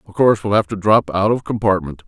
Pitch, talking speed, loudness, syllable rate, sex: 100 Hz, 260 wpm, -17 LUFS, 6.2 syllables/s, male